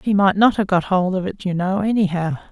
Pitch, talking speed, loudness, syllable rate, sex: 190 Hz, 260 wpm, -19 LUFS, 5.7 syllables/s, female